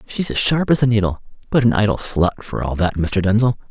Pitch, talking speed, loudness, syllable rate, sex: 110 Hz, 245 wpm, -18 LUFS, 5.8 syllables/s, male